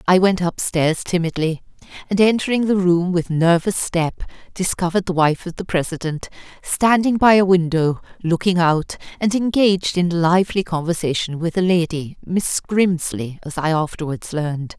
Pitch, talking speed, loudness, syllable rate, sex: 175 Hz, 155 wpm, -19 LUFS, 4.9 syllables/s, female